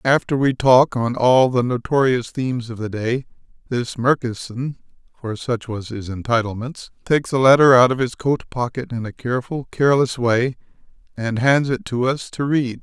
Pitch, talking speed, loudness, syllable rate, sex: 125 Hz, 175 wpm, -19 LUFS, 4.9 syllables/s, male